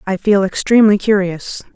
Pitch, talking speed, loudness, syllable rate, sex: 200 Hz, 135 wpm, -14 LUFS, 5.2 syllables/s, female